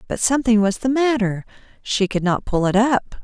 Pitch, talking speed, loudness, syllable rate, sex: 225 Hz, 205 wpm, -19 LUFS, 5.2 syllables/s, female